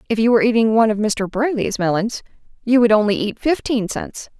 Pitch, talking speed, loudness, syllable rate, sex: 225 Hz, 205 wpm, -18 LUFS, 5.9 syllables/s, female